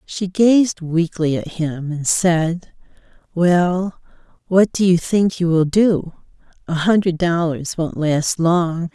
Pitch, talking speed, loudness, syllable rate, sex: 175 Hz, 140 wpm, -18 LUFS, 3.3 syllables/s, female